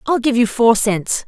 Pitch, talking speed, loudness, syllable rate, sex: 235 Hz, 235 wpm, -15 LUFS, 4.4 syllables/s, female